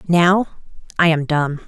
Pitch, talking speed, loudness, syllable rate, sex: 165 Hz, 145 wpm, -17 LUFS, 4.0 syllables/s, female